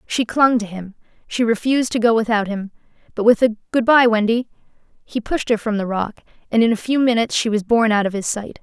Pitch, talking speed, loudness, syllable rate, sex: 225 Hz, 235 wpm, -18 LUFS, 6.1 syllables/s, female